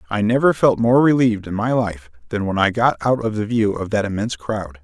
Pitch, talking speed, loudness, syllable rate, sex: 110 Hz, 250 wpm, -19 LUFS, 5.7 syllables/s, male